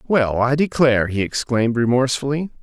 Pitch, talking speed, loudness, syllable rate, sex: 130 Hz, 135 wpm, -18 LUFS, 5.8 syllables/s, male